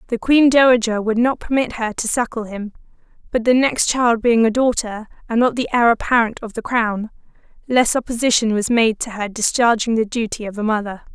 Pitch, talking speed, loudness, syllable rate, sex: 230 Hz, 200 wpm, -18 LUFS, 5.4 syllables/s, female